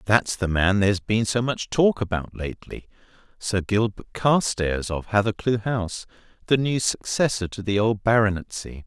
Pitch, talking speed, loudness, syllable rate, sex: 105 Hz, 150 wpm, -23 LUFS, 4.8 syllables/s, male